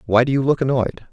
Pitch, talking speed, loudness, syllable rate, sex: 125 Hz, 270 wpm, -18 LUFS, 7.9 syllables/s, male